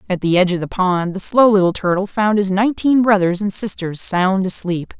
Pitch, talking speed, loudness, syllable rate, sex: 195 Hz, 215 wpm, -16 LUFS, 5.4 syllables/s, female